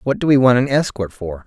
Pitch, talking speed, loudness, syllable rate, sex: 120 Hz, 285 wpm, -16 LUFS, 5.8 syllables/s, male